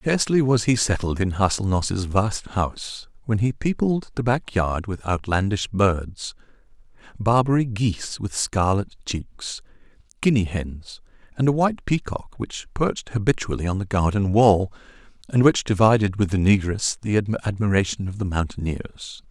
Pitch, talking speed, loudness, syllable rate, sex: 105 Hz, 140 wpm, -22 LUFS, 4.6 syllables/s, male